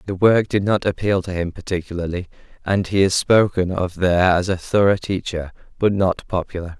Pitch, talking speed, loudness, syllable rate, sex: 95 Hz, 185 wpm, -19 LUFS, 5.3 syllables/s, male